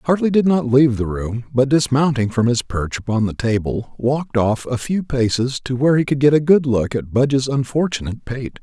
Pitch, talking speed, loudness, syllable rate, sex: 130 Hz, 215 wpm, -18 LUFS, 5.4 syllables/s, male